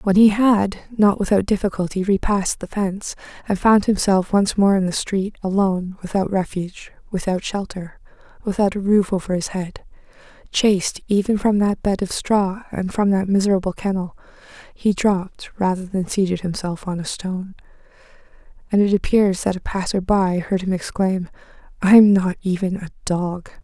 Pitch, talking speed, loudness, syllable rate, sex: 195 Hz, 165 wpm, -20 LUFS, 5.1 syllables/s, female